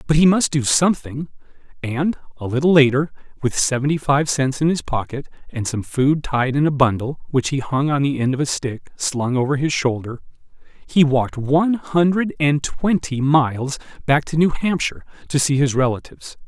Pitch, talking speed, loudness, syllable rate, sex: 140 Hz, 185 wpm, -19 LUFS, 5.2 syllables/s, male